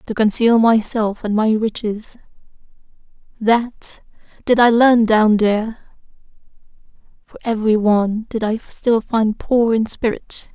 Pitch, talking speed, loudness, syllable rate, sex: 220 Hz, 120 wpm, -17 LUFS, 4.1 syllables/s, female